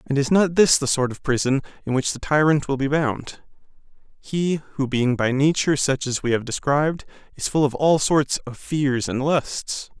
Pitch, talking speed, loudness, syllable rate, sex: 140 Hz, 200 wpm, -21 LUFS, 4.7 syllables/s, male